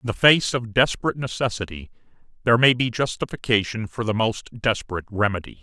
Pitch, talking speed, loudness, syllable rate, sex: 115 Hz, 160 wpm, -22 LUFS, 6.2 syllables/s, male